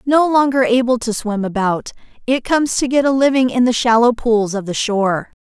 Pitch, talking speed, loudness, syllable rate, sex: 240 Hz, 210 wpm, -16 LUFS, 5.3 syllables/s, female